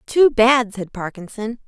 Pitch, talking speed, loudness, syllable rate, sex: 225 Hz, 145 wpm, -18 LUFS, 4.0 syllables/s, female